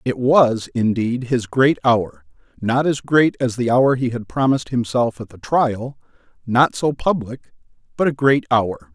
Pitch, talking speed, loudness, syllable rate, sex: 125 Hz, 175 wpm, -18 LUFS, 4.3 syllables/s, male